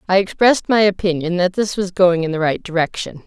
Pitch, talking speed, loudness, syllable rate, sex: 185 Hz, 220 wpm, -17 LUFS, 5.8 syllables/s, female